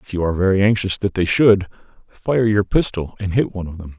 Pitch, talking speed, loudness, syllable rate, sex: 95 Hz, 240 wpm, -18 LUFS, 6.1 syllables/s, male